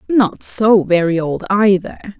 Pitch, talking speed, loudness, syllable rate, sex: 195 Hz, 135 wpm, -15 LUFS, 4.1 syllables/s, female